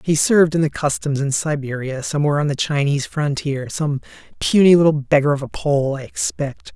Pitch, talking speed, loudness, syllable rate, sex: 145 Hz, 185 wpm, -19 LUFS, 5.6 syllables/s, male